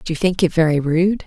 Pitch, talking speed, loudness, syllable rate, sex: 165 Hz, 285 wpm, -17 LUFS, 5.7 syllables/s, female